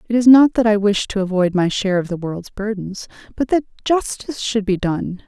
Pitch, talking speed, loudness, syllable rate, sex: 210 Hz, 230 wpm, -18 LUFS, 5.4 syllables/s, female